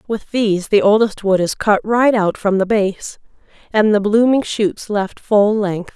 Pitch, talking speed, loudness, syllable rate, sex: 210 Hz, 190 wpm, -16 LUFS, 4.2 syllables/s, female